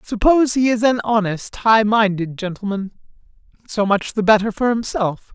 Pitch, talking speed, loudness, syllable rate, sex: 215 Hz, 145 wpm, -18 LUFS, 4.9 syllables/s, male